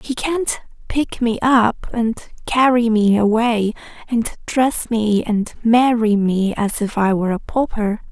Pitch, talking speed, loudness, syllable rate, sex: 225 Hz, 155 wpm, -18 LUFS, 3.8 syllables/s, female